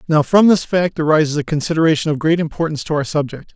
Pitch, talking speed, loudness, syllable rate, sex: 155 Hz, 220 wpm, -16 LUFS, 6.8 syllables/s, male